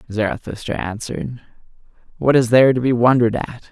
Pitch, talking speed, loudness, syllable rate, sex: 120 Hz, 145 wpm, -18 LUFS, 6.0 syllables/s, male